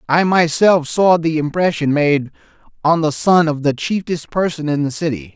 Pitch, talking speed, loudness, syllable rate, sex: 160 Hz, 190 wpm, -16 LUFS, 4.7 syllables/s, male